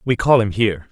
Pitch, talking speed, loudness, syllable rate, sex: 110 Hz, 260 wpm, -17 LUFS, 6.2 syllables/s, male